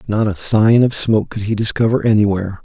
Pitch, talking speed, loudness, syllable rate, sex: 110 Hz, 205 wpm, -15 LUFS, 6.2 syllables/s, male